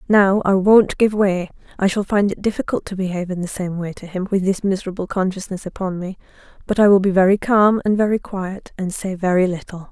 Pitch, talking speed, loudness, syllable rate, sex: 190 Hz, 225 wpm, -19 LUFS, 5.8 syllables/s, female